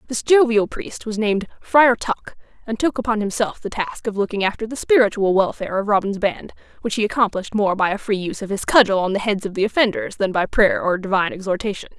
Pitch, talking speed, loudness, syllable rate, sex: 210 Hz, 220 wpm, -20 LUFS, 6.2 syllables/s, female